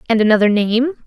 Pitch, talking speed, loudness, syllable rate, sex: 230 Hz, 170 wpm, -15 LUFS, 5.6 syllables/s, female